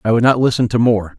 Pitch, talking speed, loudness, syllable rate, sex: 115 Hz, 305 wpm, -15 LUFS, 6.5 syllables/s, male